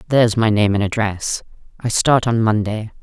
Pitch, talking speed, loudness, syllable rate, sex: 110 Hz, 180 wpm, -18 LUFS, 5.1 syllables/s, female